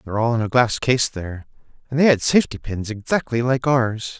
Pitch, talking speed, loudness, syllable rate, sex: 120 Hz, 215 wpm, -20 LUFS, 5.8 syllables/s, male